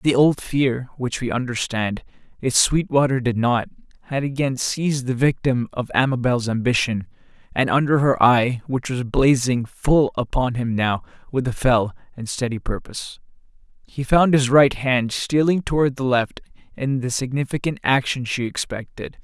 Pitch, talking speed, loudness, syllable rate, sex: 130 Hz, 155 wpm, -21 LUFS, 4.7 syllables/s, male